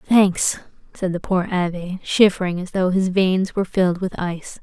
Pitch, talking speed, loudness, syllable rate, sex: 185 Hz, 180 wpm, -20 LUFS, 4.8 syllables/s, female